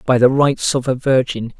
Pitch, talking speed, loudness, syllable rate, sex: 130 Hz, 225 wpm, -16 LUFS, 5.2 syllables/s, male